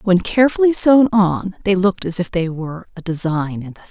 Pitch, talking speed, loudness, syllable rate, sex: 190 Hz, 230 wpm, -17 LUFS, 5.8 syllables/s, female